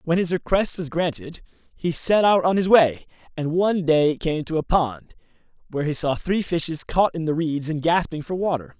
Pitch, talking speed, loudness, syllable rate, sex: 165 Hz, 210 wpm, -22 LUFS, 5.0 syllables/s, male